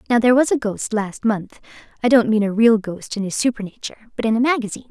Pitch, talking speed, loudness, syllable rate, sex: 225 Hz, 220 wpm, -19 LUFS, 6.7 syllables/s, female